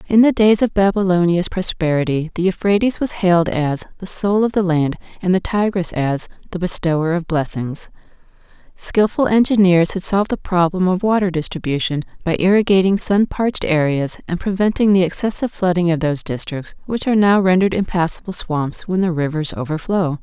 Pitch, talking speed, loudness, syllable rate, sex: 180 Hz, 165 wpm, -17 LUFS, 5.5 syllables/s, female